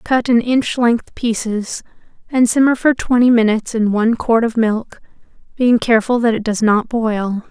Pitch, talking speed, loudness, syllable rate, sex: 230 Hz, 175 wpm, -15 LUFS, 4.7 syllables/s, female